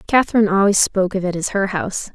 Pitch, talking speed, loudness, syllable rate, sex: 195 Hz, 225 wpm, -17 LUFS, 7.0 syllables/s, female